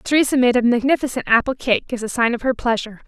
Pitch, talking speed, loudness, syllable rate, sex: 245 Hz, 235 wpm, -18 LUFS, 6.7 syllables/s, female